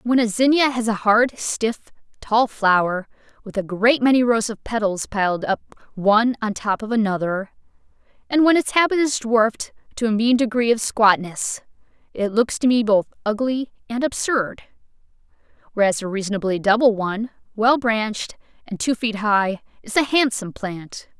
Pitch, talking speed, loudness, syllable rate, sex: 225 Hz, 165 wpm, -20 LUFS, 4.9 syllables/s, female